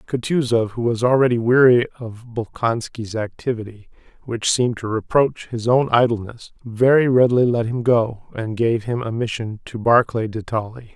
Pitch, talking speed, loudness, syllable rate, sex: 115 Hz, 160 wpm, -19 LUFS, 4.9 syllables/s, male